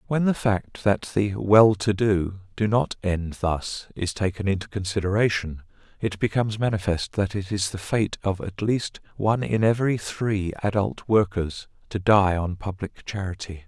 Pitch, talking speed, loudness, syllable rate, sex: 100 Hz, 165 wpm, -24 LUFS, 4.6 syllables/s, male